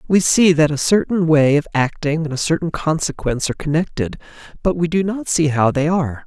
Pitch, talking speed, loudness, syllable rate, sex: 160 Hz, 210 wpm, -17 LUFS, 5.7 syllables/s, male